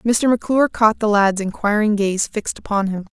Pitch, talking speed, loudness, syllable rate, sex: 210 Hz, 190 wpm, -18 LUFS, 5.6 syllables/s, female